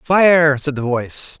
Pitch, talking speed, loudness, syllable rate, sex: 150 Hz, 170 wpm, -15 LUFS, 3.9 syllables/s, male